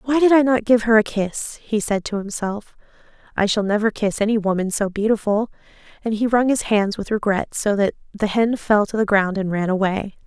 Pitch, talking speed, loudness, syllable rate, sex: 210 Hz, 220 wpm, -20 LUFS, 5.3 syllables/s, female